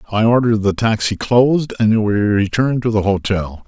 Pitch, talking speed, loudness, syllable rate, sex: 110 Hz, 180 wpm, -16 LUFS, 5.4 syllables/s, male